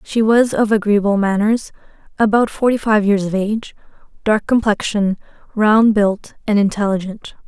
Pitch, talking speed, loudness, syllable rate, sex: 210 Hz, 135 wpm, -16 LUFS, 4.8 syllables/s, female